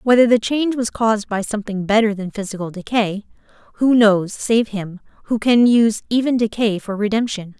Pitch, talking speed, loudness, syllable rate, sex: 215 Hz, 175 wpm, -18 LUFS, 5.4 syllables/s, female